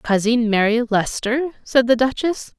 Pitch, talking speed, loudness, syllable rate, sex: 240 Hz, 140 wpm, -19 LUFS, 4.6 syllables/s, female